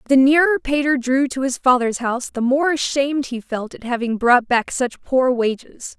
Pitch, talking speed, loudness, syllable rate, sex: 260 Hz, 200 wpm, -18 LUFS, 4.9 syllables/s, female